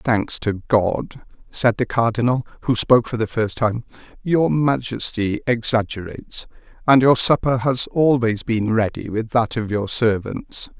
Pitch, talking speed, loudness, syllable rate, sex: 115 Hz, 150 wpm, -20 LUFS, 4.3 syllables/s, male